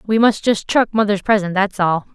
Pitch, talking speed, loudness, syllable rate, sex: 205 Hz, 225 wpm, -17 LUFS, 5.2 syllables/s, female